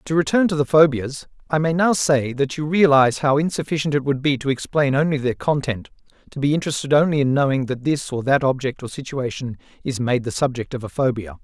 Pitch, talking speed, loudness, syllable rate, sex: 140 Hz, 220 wpm, -20 LUFS, 6.0 syllables/s, male